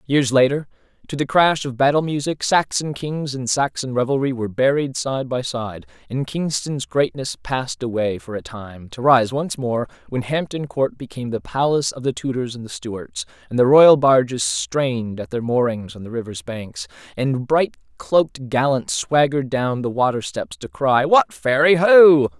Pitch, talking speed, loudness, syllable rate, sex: 130 Hz, 180 wpm, -19 LUFS, 4.7 syllables/s, male